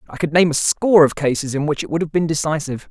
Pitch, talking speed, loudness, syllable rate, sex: 155 Hz, 290 wpm, -18 LUFS, 7.0 syllables/s, male